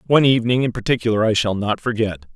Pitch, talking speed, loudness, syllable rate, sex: 115 Hz, 205 wpm, -19 LUFS, 7.1 syllables/s, male